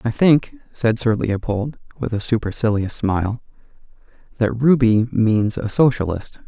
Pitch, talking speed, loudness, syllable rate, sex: 115 Hz, 130 wpm, -19 LUFS, 4.4 syllables/s, male